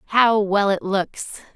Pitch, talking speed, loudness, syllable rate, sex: 205 Hz, 155 wpm, -19 LUFS, 3.7 syllables/s, female